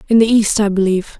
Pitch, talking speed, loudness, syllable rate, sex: 210 Hz, 250 wpm, -14 LUFS, 6.6 syllables/s, female